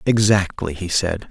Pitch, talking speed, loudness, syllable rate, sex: 95 Hz, 140 wpm, -19 LUFS, 4.2 syllables/s, male